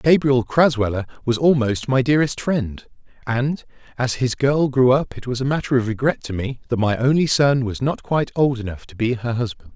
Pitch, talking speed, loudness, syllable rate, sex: 125 Hz, 210 wpm, -20 LUFS, 5.4 syllables/s, male